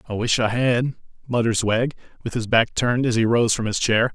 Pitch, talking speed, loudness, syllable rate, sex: 115 Hz, 230 wpm, -21 LUFS, 5.4 syllables/s, male